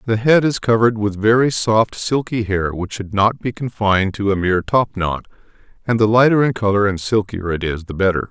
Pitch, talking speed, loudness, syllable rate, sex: 105 Hz, 210 wpm, -17 LUFS, 5.4 syllables/s, male